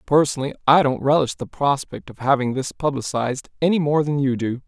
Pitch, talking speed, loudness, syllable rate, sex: 140 Hz, 195 wpm, -21 LUFS, 5.8 syllables/s, male